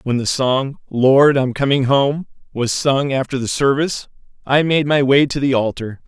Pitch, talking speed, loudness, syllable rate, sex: 135 Hz, 190 wpm, -16 LUFS, 4.6 syllables/s, male